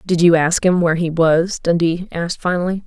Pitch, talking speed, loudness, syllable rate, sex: 170 Hz, 210 wpm, -16 LUFS, 5.5 syllables/s, female